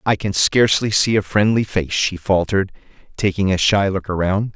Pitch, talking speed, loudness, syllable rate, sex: 100 Hz, 185 wpm, -18 LUFS, 5.3 syllables/s, male